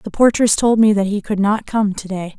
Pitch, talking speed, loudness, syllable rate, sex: 205 Hz, 275 wpm, -16 LUFS, 5.2 syllables/s, female